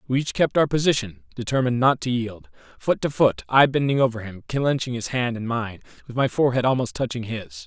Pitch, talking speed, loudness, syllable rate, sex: 125 Hz, 210 wpm, -22 LUFS, 5.8 syllables/s, male